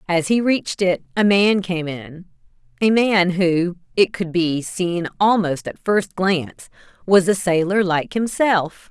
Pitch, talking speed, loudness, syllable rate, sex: 185 Hz, 160 wpm, -19 LUFS, 3.9 syllables/s, female